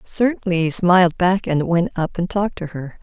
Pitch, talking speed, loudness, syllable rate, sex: 175 Hz, 220 wpm, -19 LUFS, 5.1 syllables/s, female